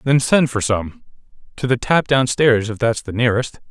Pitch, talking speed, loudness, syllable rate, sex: 120 Hz, 180 wpm, -17 LUFS, 5.0 syllables/s, male